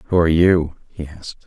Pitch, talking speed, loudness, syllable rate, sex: 85 Hz, 205 wpm, -16 LUFS, 5.6 syllables/s, male